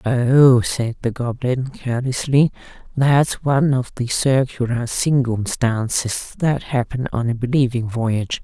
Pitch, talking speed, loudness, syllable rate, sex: 125 Hz, 120 wpm, -19 LUFS, 4.0 syllables/s, female